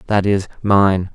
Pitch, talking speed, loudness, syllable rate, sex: 100 Hz, 155 wpm, -16 LUFS, 3.6 syllables/s, male